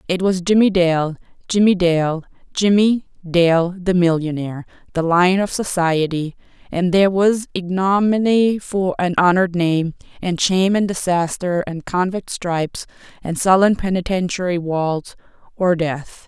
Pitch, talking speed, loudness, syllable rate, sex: 180 Hz, 120 wpm, -18 LUFS, 4.4 syllables/s, female